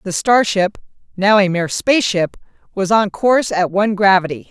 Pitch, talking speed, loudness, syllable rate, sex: 195 Hz, 160 wpm, -15 LUFS, 5.4 syllables/s, female